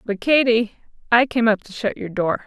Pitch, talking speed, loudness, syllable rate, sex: 220 Hz, 220 wpm, -19 LUFS, 4.8 syllables/s, female